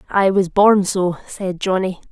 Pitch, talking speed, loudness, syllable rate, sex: 190 Hz, 170 wpm, -17 LUFS, 4.1 syllables/s, female